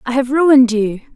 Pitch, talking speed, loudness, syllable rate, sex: 255 Hz, 205 wpm, -13 LUFS, 5.4 syllables/s, female